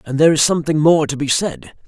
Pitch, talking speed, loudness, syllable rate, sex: 145 Hz, 255 wpm, -15 LUFS, 6.6 syllables/s, male